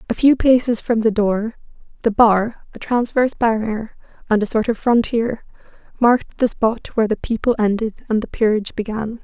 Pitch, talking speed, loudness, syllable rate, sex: 225 Hz, 175 wpm, -18 LUFS, 5.3 syllables/s, female